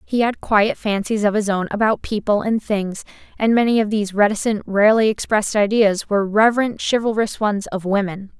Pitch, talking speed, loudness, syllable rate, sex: 210 Hz, 180 wpm, -18 LUFS, 5.5 syllables/s, female